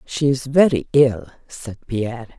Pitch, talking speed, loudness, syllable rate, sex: 125 Hz, 150 wpm, -18 LUFS, 4.4 syllables/s, female